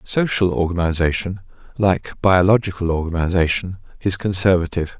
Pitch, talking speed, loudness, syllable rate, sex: 90 Hz, 85 wpm, -19 LUFS, 5.3 syllables/s, male